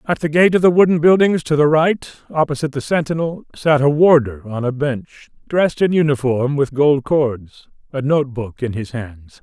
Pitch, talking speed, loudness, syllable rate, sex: 145 Hz, 190 wpm, -17 LUFS, 5.0 syllables/s, male